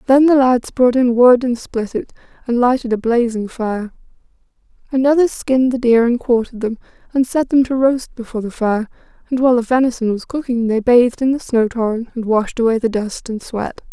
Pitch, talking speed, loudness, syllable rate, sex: 240 Hz, 210 wpm, -16 LUFS, 5.5 syllables/s, female